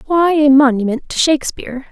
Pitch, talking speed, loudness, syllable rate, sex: 280 Hz, 155 wpm, -13 LUFS, 5.7 syllables/s, female